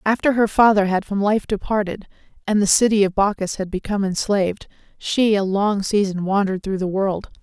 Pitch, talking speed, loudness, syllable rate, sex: 200 Hz, 185 wpm, -19 LUFS, 5.5 syllables/s, female